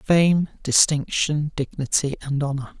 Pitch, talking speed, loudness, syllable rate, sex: 145 Hz, 105 wpm, -21 LUFS, 4.0 syllables/s, male